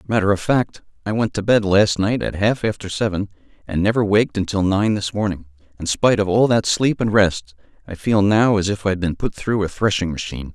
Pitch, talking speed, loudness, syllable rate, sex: 100 Hz, 230 wpm, -19 LUFS, 5.6 syllables/s, male